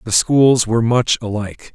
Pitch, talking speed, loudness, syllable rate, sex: 115 Hz, 170 wpm, -15 LUFS, 5.0 syllables/s, male